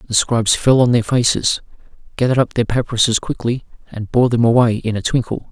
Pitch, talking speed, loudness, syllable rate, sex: 115 Hz, 195 wpm, -16 LUFS, 6.1 syllables/s, male